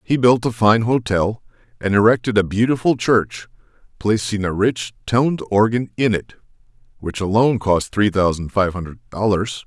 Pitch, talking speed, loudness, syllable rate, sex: 110 Hz, 155 wpm, -18 LUFS, 4.8 syllables/s, male